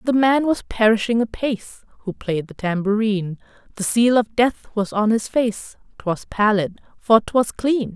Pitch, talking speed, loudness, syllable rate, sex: 220 Hz, 165 wpm, -20 LUFS, 4.6 syllables/s, female